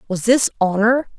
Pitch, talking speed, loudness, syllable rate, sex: 225 Hz, 150 wpm, -17 LUFS, 4.8 syllables/s, female